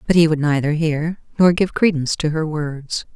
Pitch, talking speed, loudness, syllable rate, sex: 155 Hz, 210 wpm, -19 LUFS, 5.0 syllables/s, female